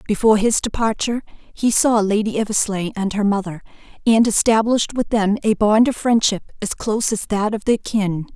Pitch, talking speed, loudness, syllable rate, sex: 215 Hz, 180 wpm, -18 LUFS, 5.2 syllables/s, female